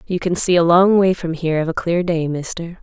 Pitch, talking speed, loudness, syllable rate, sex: 170 Hz, 275 wpm, -17 LUFS, 5.6 syllables/s, female